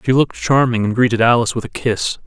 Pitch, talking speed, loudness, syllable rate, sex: 120 Hz, 240 wpm, -16 LUFS, 6.7 syllables/s, male